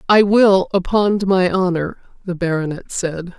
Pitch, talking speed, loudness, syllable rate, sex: 185 Hz, 140 wpm, -17 LUFS, 4.3 syllables/s, female